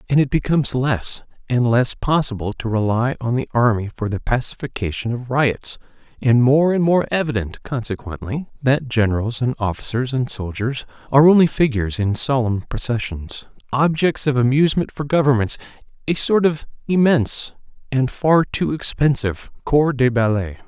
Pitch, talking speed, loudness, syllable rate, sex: 130 Hz, 135 wpm, -19 LUFS, 5.1 syllables/s, male